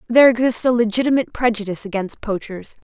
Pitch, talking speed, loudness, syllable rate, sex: 225 Hz, 145 wpm, -18 LUFS, 6.8 syllables/s, female